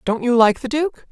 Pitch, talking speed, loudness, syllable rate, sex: 250 Hz, 270 wpm, -17 LUFS, 5.0 syllables/s, female